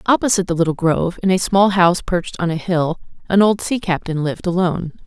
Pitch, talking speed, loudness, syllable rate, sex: 180 Hz, 215 wpm, -18 LUFS, 6.3 syllables/s, female